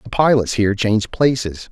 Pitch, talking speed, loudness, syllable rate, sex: 110 Hz, 175 wpm, -17 LUFS, 5.6 syllables/s, male